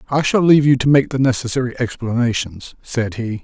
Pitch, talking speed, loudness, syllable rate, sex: 125 Hz, 190 wpm, -17 LUFS, 5.7 syllables/s, male